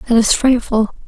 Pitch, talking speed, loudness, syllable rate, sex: 235 Hz, 170 wpm, -15 LUFS, 5.0 syllables/s, female